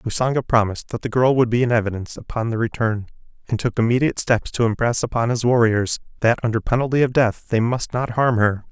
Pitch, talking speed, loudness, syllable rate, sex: 115 Hz, 215 wpm, -20 LUFS, 6.2 syllables/s, male